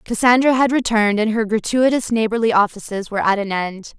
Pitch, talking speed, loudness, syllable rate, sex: 220 Hz, 180 wpm, -17 LUFS, 6.0 syllables/s, female